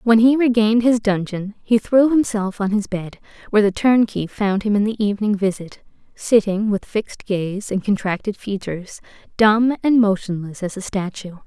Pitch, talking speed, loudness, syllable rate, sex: 210 Hz, 175 wpm, -19 LUFS, 4.9 syllables/s, female